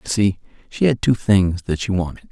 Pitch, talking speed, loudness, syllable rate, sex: 100 Hz, 235 wpm, -19 LUFS, 5.1 syllables/s, male